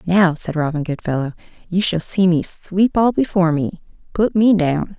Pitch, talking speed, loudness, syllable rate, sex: 175 Hz, 180 wpm, -18 LUFS, 4.8 syllables/s, female